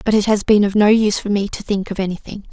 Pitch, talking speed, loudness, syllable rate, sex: 205 Hz, 310 wpm, -17 LUFS, 6.7 syllables/s, female